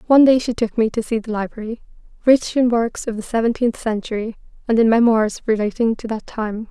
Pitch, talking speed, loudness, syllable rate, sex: 225 Hz, 205 wpm, -19 LUFS, 5.7 syllables/s, female